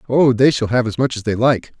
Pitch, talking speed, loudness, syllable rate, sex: 120 Hz, 300 wpm, -16 LUFS, 5.7 syllables/s, male